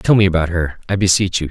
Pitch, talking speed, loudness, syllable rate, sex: 90 Hz, 280 wpm, -16 LUFS, 6.5 syllables/s, male